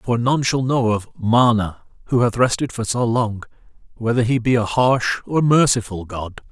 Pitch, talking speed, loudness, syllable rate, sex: 120 Hz, 185 wpm, -19 LUFS, 4.5 syllables/s, male